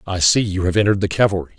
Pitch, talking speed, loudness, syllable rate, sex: 95 Hz, 265 wpm, -17 LUFS, 7.9 syllables/s, male